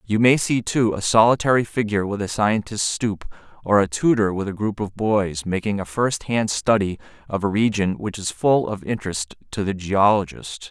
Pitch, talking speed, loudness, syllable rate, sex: 105 Hz, 190 wpm, -21 LUFS, 5.0 syllables/s, male